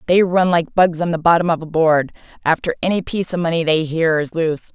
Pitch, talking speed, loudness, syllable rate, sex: 165 Hz, 230 wpm, -17 LUFS, 6.1 syllables/s, female